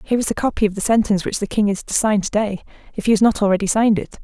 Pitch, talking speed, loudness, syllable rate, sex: 210 Hz, 310 wpm, -18 LUFS, 7.6 syllables/s, female